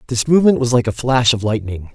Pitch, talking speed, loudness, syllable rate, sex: 120 Hz, 245 wpm, -15 LUFS, 6.3 syllables/s, male